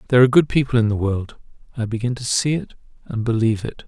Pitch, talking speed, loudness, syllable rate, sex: 120 Hz, 230 wpm, -20 LUFS, 7.0 syllables/s, male